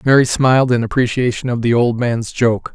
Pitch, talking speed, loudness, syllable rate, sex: 120 Hz, 195 wpm, -15 LUFS, 5.3 syllables/s, male